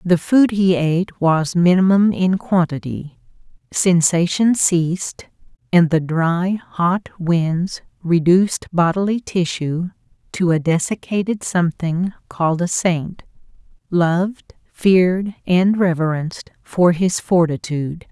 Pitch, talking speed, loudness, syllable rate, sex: 175 Hz, 105 wpm, -18 LUFS, 3.9 syllables/s, female